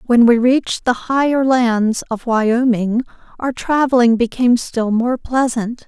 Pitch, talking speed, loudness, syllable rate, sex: 240 Hz, 145 wpm, -16 LUFS, 4.2 syllables/s, female